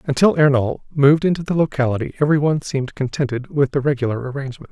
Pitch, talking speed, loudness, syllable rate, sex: 140 Hz, 180 wpm, -19 LUFS, 7.1 syllables/s, male